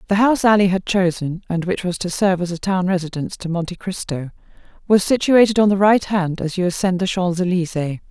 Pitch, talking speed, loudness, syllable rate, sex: 185 Hz, 215 wpm, -18 LUFS, 6.0 syllables/s, female